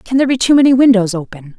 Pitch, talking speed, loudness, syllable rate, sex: 230 Hz, 265 wpm, -11 LUFS, 7.1 syllables/s, female